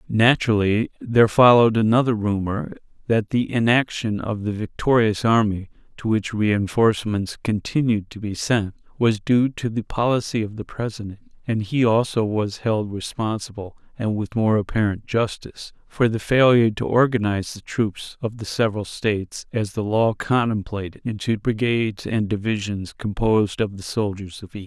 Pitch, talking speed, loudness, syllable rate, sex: 110 Hz, 155 wpm, -21 LUFS, 5.0 syllables/s, male